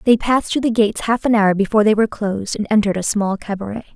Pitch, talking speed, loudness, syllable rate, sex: 215 Hz, 260 wpm, -17 LUFS, 7.3 syllables/s, female